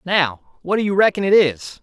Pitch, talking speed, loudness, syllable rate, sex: 175 Hz, 230 wpm, -17 LUFS, 4.7 syllables/s, male